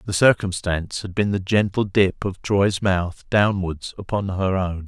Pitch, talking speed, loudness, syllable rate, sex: 95 Hz, 170 wpm, -21 LUFS, 4.3 syllables/s, male